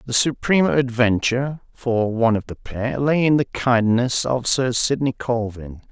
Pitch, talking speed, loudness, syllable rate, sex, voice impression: 120 Hz, 160 wpm, -20 LUFS, 4.5 syllables/s, male, very masculine, adult-like, slightly middle-aged, thick, slightly tensed, slightly powerful, slightly bright, slightly soft, slightly muffled, fluent, slightly raspy, cool, intellectual, sincere, very calm, slightly mature, friendly, slightly reassuring, unique, slightly wild, slightly sweet, kind, slightly modest